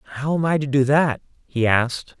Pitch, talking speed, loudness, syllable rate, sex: 135 Hz, 220 wpm, -20 LUFS, 6.0 syllables/s, male